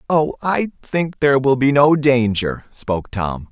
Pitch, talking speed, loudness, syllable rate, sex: 130 Hz, 170 wpm, -17 LUFS, 4.2 syllables/s, male